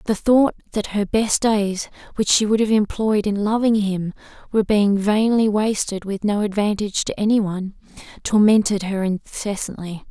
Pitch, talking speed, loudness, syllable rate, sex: 205 Hz, 155 wpm, -20 LUFS, 4.8 syllables/s, female